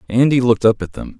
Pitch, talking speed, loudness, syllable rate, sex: 120 Hz, 250 wpm, -15 LUFS, 7.0 syllables/s, male